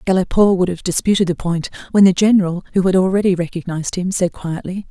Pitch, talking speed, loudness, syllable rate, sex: 180 Hz, 195 wpm, -17 LUFS, 6.3 syllables/s, female